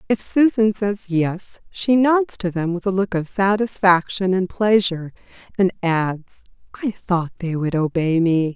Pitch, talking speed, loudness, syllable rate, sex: 190 Hz, 160 wpm, -20 LUFS, 4.4 syllables/s, female